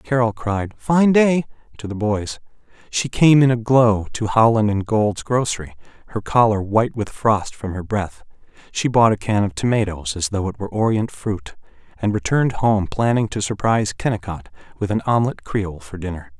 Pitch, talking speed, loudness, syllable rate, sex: 110 Hz, 185 wpm, -19 LUFS, 5.1 syllables/s, male